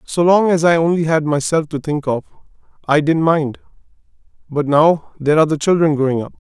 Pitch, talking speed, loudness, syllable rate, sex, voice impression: 155 Hz, 195 wpm, -16 LUFS, 5.7 syllables/s, male, masculine, adult-like, slightly muffled, slightly sincere, slightly unique